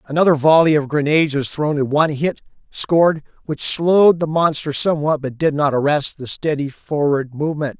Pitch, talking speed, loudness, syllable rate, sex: 150 Hz, 175 wpm, -17 LUFS, 5.5 syllables/s, male